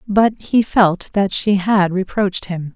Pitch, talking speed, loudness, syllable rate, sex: 195 Hz, 175 wpm, -17 LUFS, 4.0 syllables/s, female